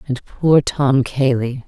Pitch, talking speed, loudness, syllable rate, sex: 135 Hz, 145 wpm, -17 LUFS, 3.3 syllables/s, female